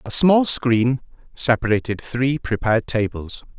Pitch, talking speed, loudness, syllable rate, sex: 120 Hz, 115 wpm, -19 LUFS, 4.3 syllables/s, male